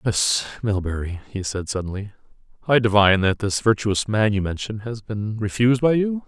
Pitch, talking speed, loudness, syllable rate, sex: 105 Hz, 170 wpm, -21 LUFS, 5.2 syllables/s, male